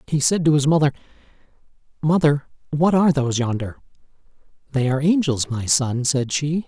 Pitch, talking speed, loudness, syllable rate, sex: 145 Hz, 155 wpm, -20 LUFS, 5.6 syllables/s, male